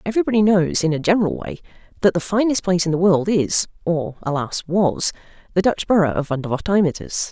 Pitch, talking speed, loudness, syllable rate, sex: 180 Hz, 165 wpm, -19 LUFS, 6.1 syllables/s, female